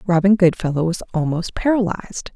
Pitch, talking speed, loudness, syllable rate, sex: 180 Hz, 125 wpm, -19 LUFS, 5.7 syllables/s, female